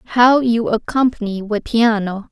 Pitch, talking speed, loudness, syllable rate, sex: 225 Hz, 130 wpm, -16 LUFS, 4.0 syllables/s, female